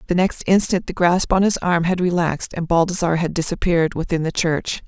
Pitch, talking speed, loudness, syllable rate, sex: 175 Hz, 220 wpm, -19 LUFS, 6.0 syllables/s, female